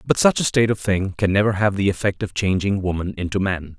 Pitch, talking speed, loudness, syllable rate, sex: 100 Hz, 255 wpm, -20 LUFS, 6.1 syllables/s, male